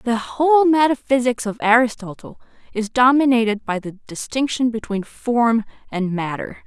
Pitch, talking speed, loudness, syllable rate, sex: 235 Hz, 125 wpm, -19 LUFS, 4.7 syllables/s, female